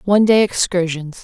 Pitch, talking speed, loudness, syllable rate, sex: 185 Hz, 145 wpm, -16 LUFS, 5.4 syllables/s, female